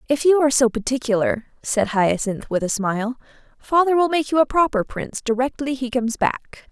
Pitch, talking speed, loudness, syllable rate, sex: 250 Hz, 190 wpm, -20 LUFS, 5.6 syllables/s, female